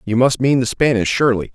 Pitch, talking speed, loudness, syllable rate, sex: 120 Hz, 235 wpm, -16 LUFS, 6.3 syllables/s, male